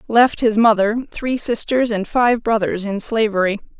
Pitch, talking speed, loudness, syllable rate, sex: 220 Hz, 160 wpm, -18 LUFS, 4.5 syllables/s, female